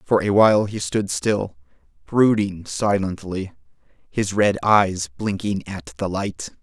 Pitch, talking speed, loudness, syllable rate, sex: 100 Hz, 135 wpm, -21 LUFS, 3.8 syllables/s, male